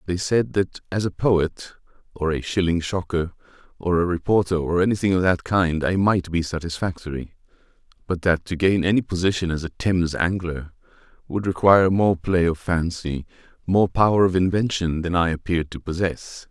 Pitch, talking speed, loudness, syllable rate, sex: 90 Hz, 170 wpm, -22 LUFS, 5.2 syllables/s, male